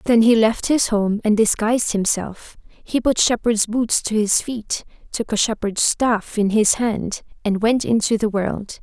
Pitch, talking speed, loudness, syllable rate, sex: 220 Hz, 185 wpm, -19 LUFS, 4.2 syllables/s, female